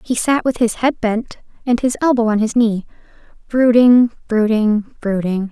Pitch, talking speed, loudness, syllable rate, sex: 230 Hz, 165 wpm, -16 LUFS, 4.4 syllables/s, female